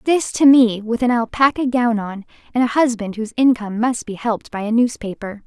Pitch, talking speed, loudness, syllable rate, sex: 235 Hz, 210 wpm, -18 LUFS, 5.5 syllables/s, female